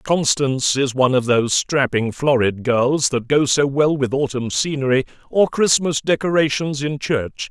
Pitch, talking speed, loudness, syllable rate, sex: 140 Hz, 160 wpm, -18 LUFS, 4.6 syllables/s, male